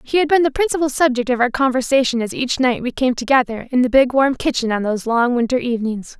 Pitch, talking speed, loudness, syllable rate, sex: 255 Hz, 240 wpm, -17 LUFS, 6.3 syllables/s, female